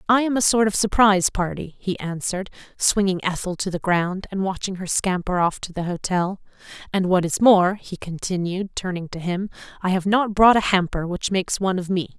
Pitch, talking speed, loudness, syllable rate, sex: 190 Hz, 205 wpm, -21 LUFS, 5.4 syllables/s, female